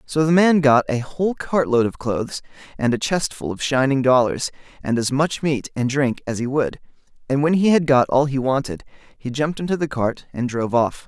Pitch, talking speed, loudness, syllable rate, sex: 135 Hz, 230 wpm, -20 LUFS, 5.3 syllables/s, male